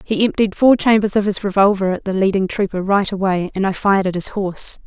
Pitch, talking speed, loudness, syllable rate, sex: 195 Hz, 235 wpm, -17 LUFS, 6.0 syllables/s, female